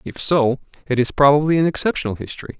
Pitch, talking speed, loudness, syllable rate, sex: 140 Hz, 185 wpm, -18 LUFS, 6.8 syllables/s, male